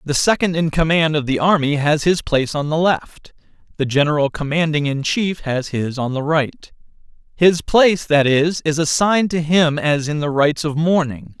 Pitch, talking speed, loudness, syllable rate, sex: 155 Hz, 190 wpm, -17 LUFS, 4.9 syllables/s, male